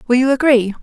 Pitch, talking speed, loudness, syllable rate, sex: 250 Hz, 220 wpm, -14 LUFS, 6.6 syllables/s, female